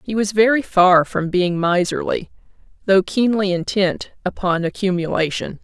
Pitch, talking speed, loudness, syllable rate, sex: 190 Hz, 130 wpm, -18 LUFS, 4.6 syllables/s, female